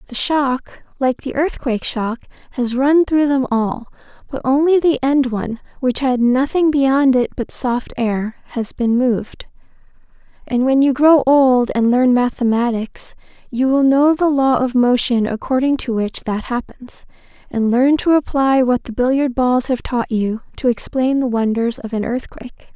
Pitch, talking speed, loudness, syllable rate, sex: 255 Hz, 170 wpm, -17 LUFS, 4.4 syllables/s, female